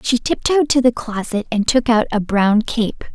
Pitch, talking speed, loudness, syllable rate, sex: 230 Hz, 210 wpm, -17 LUFS, 4.5 syllables/s, female